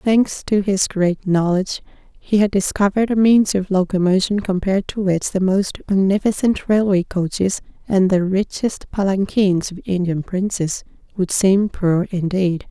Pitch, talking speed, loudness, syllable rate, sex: 190 Hz, 145 wpm, -18 LUFS, 4.5 syllables/s, female